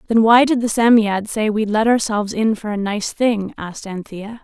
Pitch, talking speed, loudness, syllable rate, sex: 215 Hz, 215 wpm, -17 LUFS, 5.0 syllables/s, female